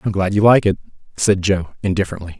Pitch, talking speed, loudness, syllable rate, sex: 95 Hz, 225 wpm, -17 LUFS, 7.1 syllables/s, male